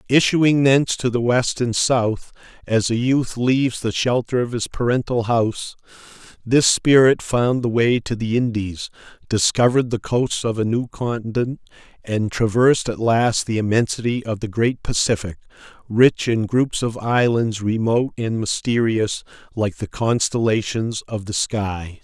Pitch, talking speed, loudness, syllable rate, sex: 115 Hz, 150 wpm, -19 LUFS, 4.5 syllables/s, male